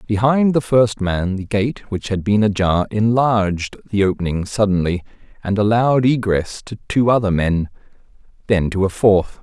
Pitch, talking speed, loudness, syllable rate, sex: 105 Hz, 160 wpm, -18 LUFS, 4.7 syllables/s, male